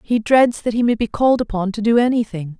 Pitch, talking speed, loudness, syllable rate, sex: 225 Hz, 255 wpm, -17 LUFS, 6.0 syllables/s, female